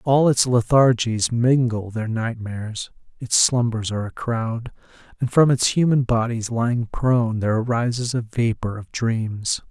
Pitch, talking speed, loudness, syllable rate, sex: 115 Hz, 150 wpm, -21 LUFS, 4.4 syllables/s, male